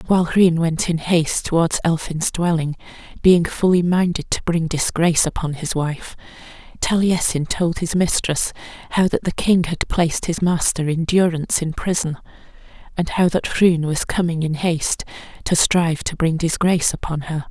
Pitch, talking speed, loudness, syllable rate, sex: 165 Hz, 165 wpm, -19 LUFS, 4.9 syllables/s, female